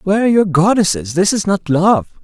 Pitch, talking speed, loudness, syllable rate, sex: 185 Hz, 215 wpm, -14 LUFS, 6.0 syllables/s, male